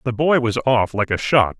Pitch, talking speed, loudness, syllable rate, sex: 120 Hz, 265 wpm, -18 LUFS, 5.0 syllables/s, male